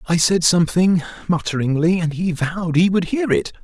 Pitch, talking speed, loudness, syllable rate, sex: 175 Hz, 180 wpm, -18 LUFS, 5.3 syllables/s, male